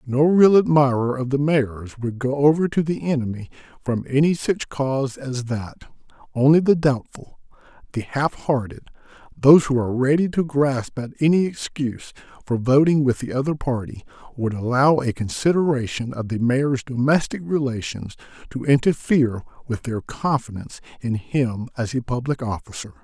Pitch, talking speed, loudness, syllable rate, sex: 130 Hz, 150 wpm, -21 LUFS, 5.0 syllables/s, male